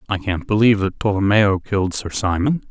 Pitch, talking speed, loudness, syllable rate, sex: 100 Hz, 175 wpm, -18 LUFS, 5.7 syllables/s, male